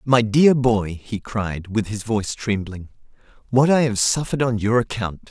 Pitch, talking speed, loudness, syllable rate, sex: 110 Hz, 180 wpm, -20 LUFS, 4.6 syllables/s, male